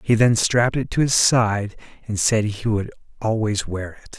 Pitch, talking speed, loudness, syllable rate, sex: 110 Hz, 200 wpm, -20 LUFS, 4.7 syllables/s, male